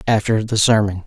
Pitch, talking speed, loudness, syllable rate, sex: 105 Hz, 170 wpm, -17 LUFS, 5.4 syllables/s, male